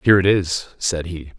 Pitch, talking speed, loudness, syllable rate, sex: 90 Hz, 215 wpm, -19 LUFS, 5.2 syllables/s, male